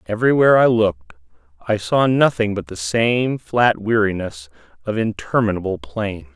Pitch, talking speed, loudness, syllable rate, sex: 105 Hz, 130 wpm, -18 LUFS, 5.1 syllables/s, male